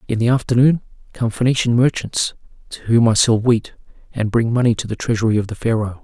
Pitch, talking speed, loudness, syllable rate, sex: 115 Hz, 200 wpm, -17 LUFS, 6.0 syllables/s, male